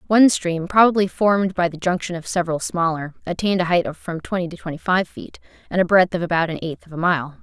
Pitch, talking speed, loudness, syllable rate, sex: 175 Hz, 240 wpm, -20 LUFS, 6.3 syllables/s, female